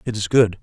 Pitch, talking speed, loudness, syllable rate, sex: 105 Hz, 290 wpm, -18 LUFS, 6.0 syllables/s, male